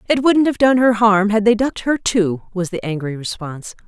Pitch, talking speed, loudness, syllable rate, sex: 210 Hz, 230 wpm, -17 LUFS, 5.4 syllables/s, female